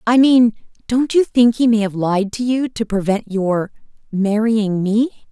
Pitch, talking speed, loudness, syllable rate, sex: 220 Hz, 170 wpm, -17 LUFS, 4.2 syllables/s, female